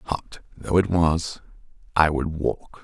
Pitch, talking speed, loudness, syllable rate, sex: 80 Hz, 150 wpm, -23 LUFS, 3.2 syllables/s, male